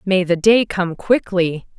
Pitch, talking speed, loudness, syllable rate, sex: 185 Hz, 170 wpm, -17 LUFS, 3.8 syllables/s, female